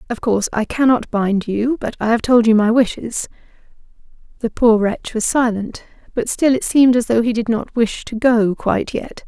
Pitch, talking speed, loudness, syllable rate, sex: 230 Hz, 205 wpm, -17 LUFS, 5.1 syllables/s, female